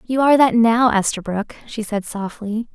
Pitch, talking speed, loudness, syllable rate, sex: 225 Hz, 175 wpm, -18 LUFS, 4.8 syllables/s, female